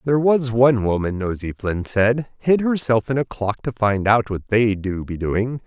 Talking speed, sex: 210 wpm, male